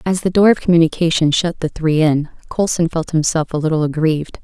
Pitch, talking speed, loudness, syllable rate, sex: 165 Hz, 205 wpm, -16 LUFS, 5.8 syllables/s, female